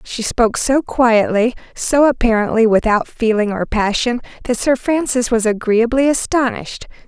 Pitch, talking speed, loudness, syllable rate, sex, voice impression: 235 Hz, 135 wpm, -16 LUFS, 4.7 syllables/s, female, feminine, adult-like, slightly muffled, fluent, slightly unique, slightly kind